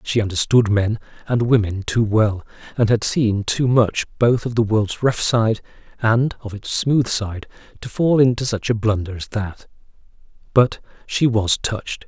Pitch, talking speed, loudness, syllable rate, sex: 110 Hz, 175 wpm, -19 LUFS, 4.3 syllables/s, male